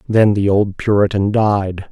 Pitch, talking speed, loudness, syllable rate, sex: 100 Hz, 155 wpm, -15 LUFS, 4.1 syllables/s, male